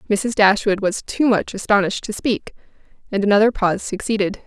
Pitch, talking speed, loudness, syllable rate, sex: 205 Hz, 160 wpm, -19 LUFS, 5.7 syllables/s, female